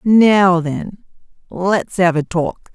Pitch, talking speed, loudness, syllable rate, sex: 180 Hz, 130 wpm, -16 LUFS, 2.9 syllables/s, female